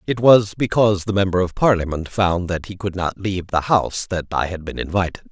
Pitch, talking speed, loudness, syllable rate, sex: 95 Hz, 225 wpm, -19 LUFS, 5.8 syllables/s, male